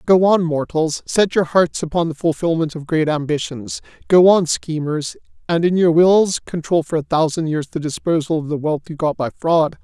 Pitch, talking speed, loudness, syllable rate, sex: 160 Hz, 200 wpm, -18 LUFS, 4.9 syllables/s, male